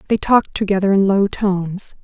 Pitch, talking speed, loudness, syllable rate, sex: 195 Hz, 175 wpm, -17 LUFS, 5.6 syllables/s, female